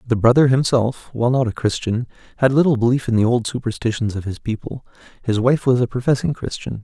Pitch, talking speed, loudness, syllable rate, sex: 120 Hz, 200 wpm, -19 LUFS, 6.1 syllables/s, male